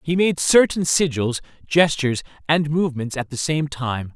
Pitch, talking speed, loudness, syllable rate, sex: 145 Hz, 160 wpm, -20 LUFS, 4.8 syllables/s, male